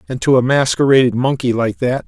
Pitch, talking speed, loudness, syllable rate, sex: 130 Hz, 205 wpm, -15 LUFS, 5.8 syllables/s, male